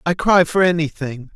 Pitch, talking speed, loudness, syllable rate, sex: 160 Hz, 175 wpm, -16 LUFS, 4.9 syllables/s, male